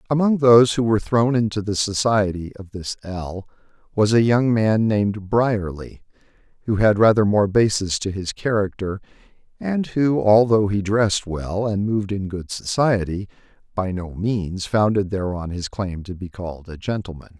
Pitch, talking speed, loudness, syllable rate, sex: 105 Hz, 165 wpm, -20 LUFS, 4.7 syllables/s, male